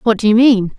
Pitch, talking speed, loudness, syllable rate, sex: 220 Hz, 305 wpm, -12 LUFS, 5.8 syllables/s, female